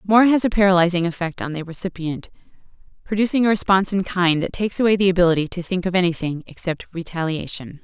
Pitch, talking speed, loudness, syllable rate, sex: 180 Hz, 185 wpm, -20 LUFS, 6.5 syllables/s, female